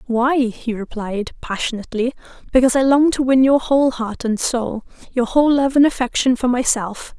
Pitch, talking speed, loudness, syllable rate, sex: 245 Hz, 175 wpm, -18 LUFS, 5.3 syllables/s, female